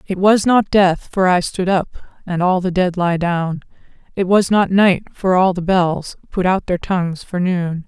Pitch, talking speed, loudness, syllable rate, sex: 185 Hz, 215 wpm, -17 LUFS, 4.3 syllables/s, female